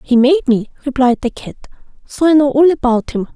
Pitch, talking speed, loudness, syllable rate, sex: 270 Hz, 215 wpm, -14 LUFS, 5.8 syllables/s, female